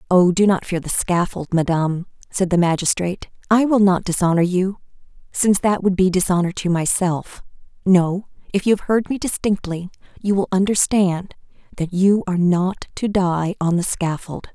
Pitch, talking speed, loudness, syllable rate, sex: 185 Hz, 170 wpm, -19 LUFS, 5.0 syllables/s, female